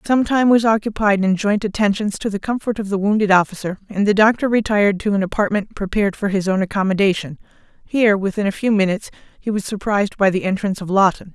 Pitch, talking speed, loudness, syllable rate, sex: 205 Hz, 205 wpm, -18 LUFS, 6.4 syllables/s, female